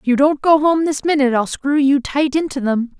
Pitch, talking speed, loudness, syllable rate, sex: 280 Hz, 260 wpm, -16 LUFS, 5.4 syllables/s, female